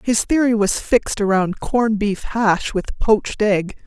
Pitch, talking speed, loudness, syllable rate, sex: 215 Hz, 170 wpm, -18 LUFS, 4.4 syllables/s, female